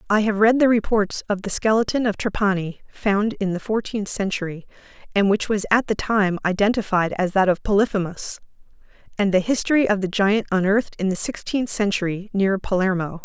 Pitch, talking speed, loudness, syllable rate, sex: 205 Hz, 175 wpm, -21 LUFS, 5.4 syllables/s, female